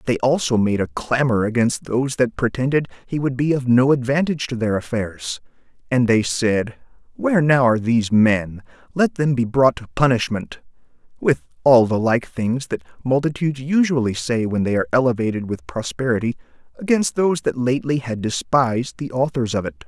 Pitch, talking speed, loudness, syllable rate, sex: 125 Hz, 170 wpm, -20 LUFS, 5.4 syllables/s, male